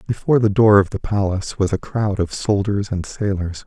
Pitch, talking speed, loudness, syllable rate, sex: 100 Hz, 215 wpm, -19 LUFS, 5.4 syllables/s, male